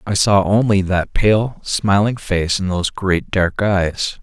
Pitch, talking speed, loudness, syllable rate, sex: 100 Hz, 170 wpm, -17 LUFS, 3.7 syllables/s, male